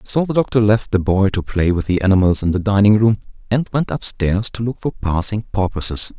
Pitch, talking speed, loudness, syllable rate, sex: 105 Hz, 225 wpm, -17 LUFS, 5.5 syllables/s, male